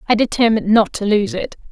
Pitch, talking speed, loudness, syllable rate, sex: 210 Hz, 210 wpm, -16 LUFS, 6.3 syllables/s, female